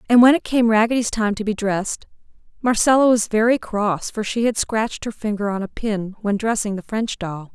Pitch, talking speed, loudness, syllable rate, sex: 215 Hz, 215 wpm, -20 LUFS, 5.3 syllables/s, female